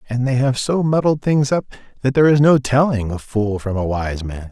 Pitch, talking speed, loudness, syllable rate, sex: 125 Hz, 240 wpm, -18 LUFS, 5.3 syllables/s, male